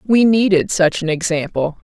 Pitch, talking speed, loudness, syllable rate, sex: 180 Hz, 155 wpm, -16 LUFS, 4.6 syllables/s, female